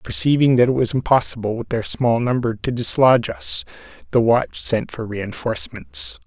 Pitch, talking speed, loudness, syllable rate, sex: 120 Hz, 165 wpm, -19 LUFS, 5.0 syllables/s, male